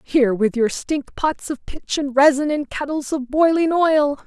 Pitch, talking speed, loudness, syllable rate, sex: 285 Hz, 195 wpm, -19 LUFS, 4.4 syllables/s, female